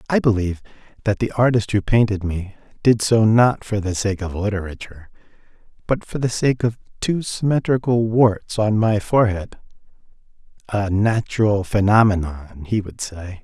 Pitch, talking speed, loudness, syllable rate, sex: 105 Hz, 145 wpm, -19 LUFS, 4.9 syllables/s, male